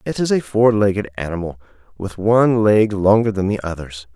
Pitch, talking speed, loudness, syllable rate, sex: 100 Hz, 190 wpm, -17 LUFS, 5.3 syllables/s, male